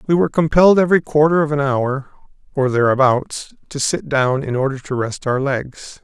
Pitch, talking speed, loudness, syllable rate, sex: 140 Hz, 190 wpm, -17 LUFS, 5.3 syllables/s, male